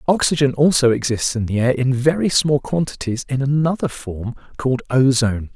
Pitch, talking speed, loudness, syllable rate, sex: 135 Hz, 160 wpm, -18 LUFS, 5.4 syllables/s, male